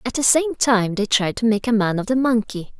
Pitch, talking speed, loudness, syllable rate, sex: 230 Hz, 280 wpm, -19 LUFS, 5.2 syllables/s, female